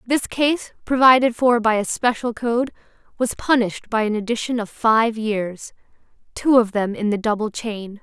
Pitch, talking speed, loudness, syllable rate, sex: 225 Hz, 170 wpm, -20 LUFS, 4.7 syllables/s, female